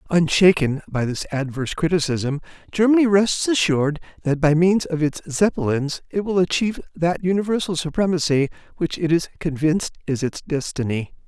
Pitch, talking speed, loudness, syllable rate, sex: 165 Hz, 145 wpm, -21 LUFS, 5.4 syllables/s, male